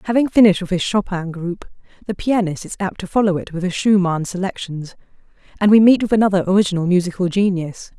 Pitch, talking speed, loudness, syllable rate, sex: 190 Hz, 190 wpm, -17 LUFS, 6.2 syllables/s, female